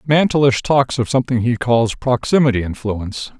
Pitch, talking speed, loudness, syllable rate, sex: 125 Hz, 140 wpm, -17 LUFS, 5.2 syllables/s, male